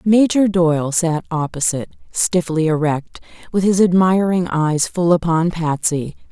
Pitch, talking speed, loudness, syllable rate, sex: 170 Hz, 125 wpm, -17 LUFS, 4.4 syllables/s, female